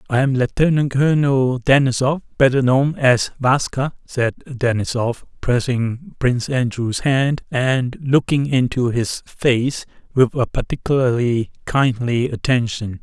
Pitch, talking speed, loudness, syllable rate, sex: 130 Hz, 110 wpm, -18 LUFS, 3.9 syllables/s, male